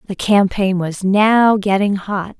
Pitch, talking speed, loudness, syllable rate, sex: 200 Hz, 150 wpm, -15 LUFS, 3.6 syllables/s, female